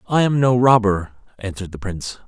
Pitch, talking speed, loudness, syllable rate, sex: 110 Hz, 185 wpm, -18 LUFS, 6.0 syllables/s, male